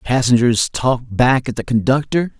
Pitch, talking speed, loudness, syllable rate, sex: 125 Hz, 150 wpm, -16 LUFS, 4.4 syllables/s, male